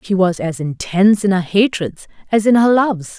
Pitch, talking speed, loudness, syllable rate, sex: 195 Hz, 205 wpm, -15 LUFS, 5.2 syllables/s, female